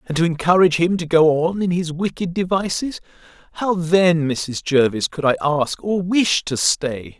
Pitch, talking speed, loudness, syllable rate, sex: 165 Hz, 175 wpm, -19 LUFS, 4.6 syllables/s, male